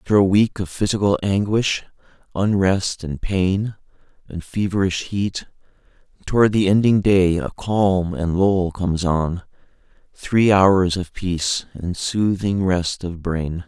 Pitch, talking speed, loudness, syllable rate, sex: 95 Hz, 135 wpm, -20 LUFS, 3.9 syllables/s, male